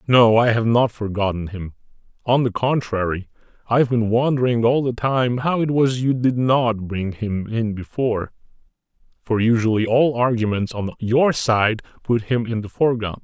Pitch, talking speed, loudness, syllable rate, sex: 115 Hz, 170 wpm, -20 LUFS, 4.8 syllables/s, male